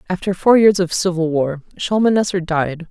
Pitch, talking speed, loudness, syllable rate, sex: 180 Hz, 165 wpm, -17 LUFS, 5.1 syllables/s, female